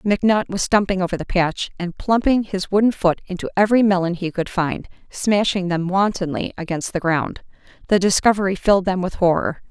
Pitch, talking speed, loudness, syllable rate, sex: 190 Hz, 180 wpm, -19 LUFS, 5.5 syllables/s, female